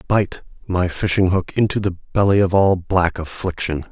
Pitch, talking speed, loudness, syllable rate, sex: 95 Hz, 170 wpm, -19 LUFS, 4.6 syllables/s, male